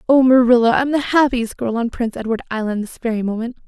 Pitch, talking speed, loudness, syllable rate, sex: 240 Hz, 210 wpm, -17 LUFS, 6.4 syllables/s, female